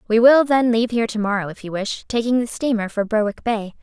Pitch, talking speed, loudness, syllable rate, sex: 225 Hz, 250 wpm, -19 LUFS, 6.2 syllables/s, female